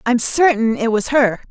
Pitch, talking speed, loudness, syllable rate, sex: 240 Hz, 200 wpm, -16 LUFS, 4.6 syllables/s, female